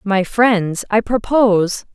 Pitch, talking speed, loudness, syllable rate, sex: 210 Hz, 125 wpm, -16 LUFS, 3.5 syllables/s, female